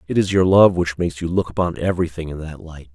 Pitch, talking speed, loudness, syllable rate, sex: 85 Hz, 265 wpm, -19 LUFS, 6.5 syllables/s, male